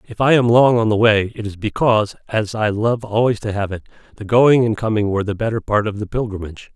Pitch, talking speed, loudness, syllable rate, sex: 110 Hz, 250 wpm, -17 LUFS, 6.1 syllables/s, male